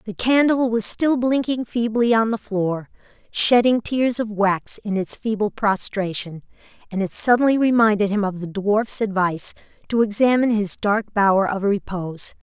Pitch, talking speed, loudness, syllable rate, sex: 215 Hz, 160 wpm, -20 LUFS, 4.7 syllables/s, female